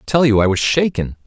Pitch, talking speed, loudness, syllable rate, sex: 120 Hz, 285 wpm, -16 LUFS, 6.3 syllables/s, male